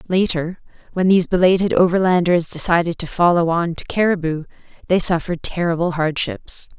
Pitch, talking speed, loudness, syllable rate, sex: 175 Hz, 135 wpm, -18 LUFS, 5.6 syllables/s, female